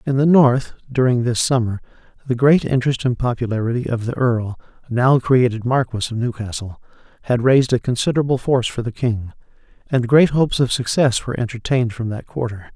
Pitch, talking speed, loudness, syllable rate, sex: 125 Hz, 175 wpm, -18 LUFS, 5.9 syllables/s, male